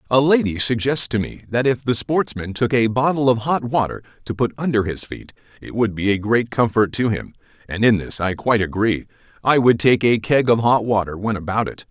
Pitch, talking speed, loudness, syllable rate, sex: 115 Hz, 225 wpm, -19 LUFS, 5.4 syllables/s, male